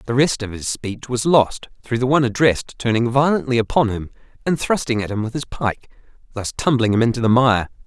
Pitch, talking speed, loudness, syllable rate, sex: 120 Hz, 215 wpm, -19 LUFS, 5.8 syllables/s, male